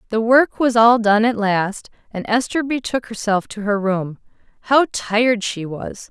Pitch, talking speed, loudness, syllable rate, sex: 220 Hz, 175 wpm, -18 LUFS, 4.2 syllables/s, female